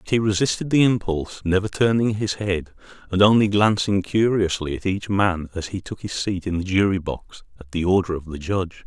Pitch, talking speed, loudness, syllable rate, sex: 95 Hz, 210 wpm, -21 LUFS, 5.4 syllables/s, male